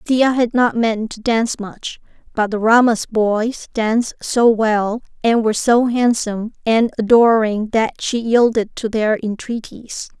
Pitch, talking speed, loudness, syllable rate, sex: 225 Hz, 155 wpm, -17 LUFS, 4.1 syllables/s, female